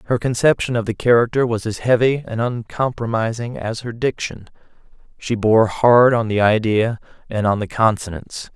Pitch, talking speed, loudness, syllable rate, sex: 115 Hz, 160 wpm, -18 LUFS, 4.9 syllables/s, male